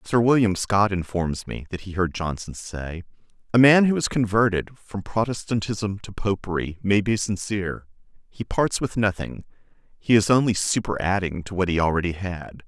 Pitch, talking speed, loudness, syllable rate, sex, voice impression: 100 Hz, 165 wpm, -23 LUFS, 4.9 syllables/s, male, very masculine, very middle-aged, very thick, very tensed, very powerful, slightly bright, soft, very clear, muffled, slightly halting, slightly raspy, very cool, very intellectual, slightly refreshing, sincere, very calm, very mature, friendly, reassuring, unique, elegant, slightly wild, sweet, lively, kind, slightly modest